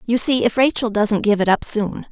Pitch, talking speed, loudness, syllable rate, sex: 225 Hz, 255 wpm, -18 LUFS, 5.1 syllables/s, female